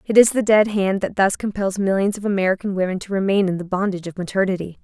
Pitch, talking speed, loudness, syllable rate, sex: 195 Hz, 235 wpm, -20 LUFS, 6.6 syllables/s, female